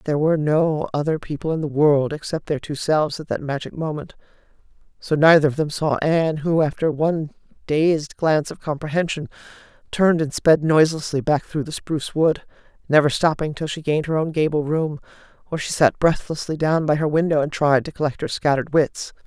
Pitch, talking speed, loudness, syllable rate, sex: 150 Hz, 195 wpm, -20 LUFS, 5.8 syllables/s, female